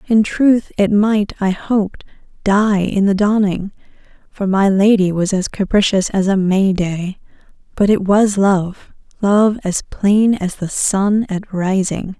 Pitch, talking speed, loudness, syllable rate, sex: 200 Hz, 150 wpm, -16 LUFS, 3.8 syllables/s, female